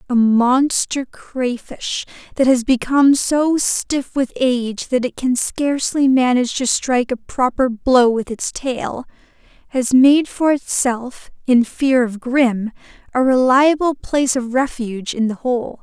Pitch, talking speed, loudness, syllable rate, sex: 255 Hz, 150 wpm, -17 LUFS, 4.0 syllables/s, female